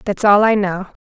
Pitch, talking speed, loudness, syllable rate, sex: 200 Hz, 235 wpm, -14 LUFS, 5.1 syllables/s, female